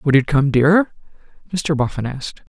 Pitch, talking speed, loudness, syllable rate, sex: 145 Hz, 165 wpm, -18 LUFS, 5.3 syllables/s, male